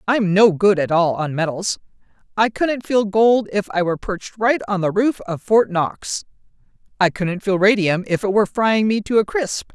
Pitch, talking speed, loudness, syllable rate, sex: 200 Hz, 205 wpm, -18 LUFS, 4.8 syllables/s, female